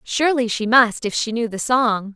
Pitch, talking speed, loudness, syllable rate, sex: 230 Hz, 220 wpm, -18 LUFS, 4.9 syllables/s, female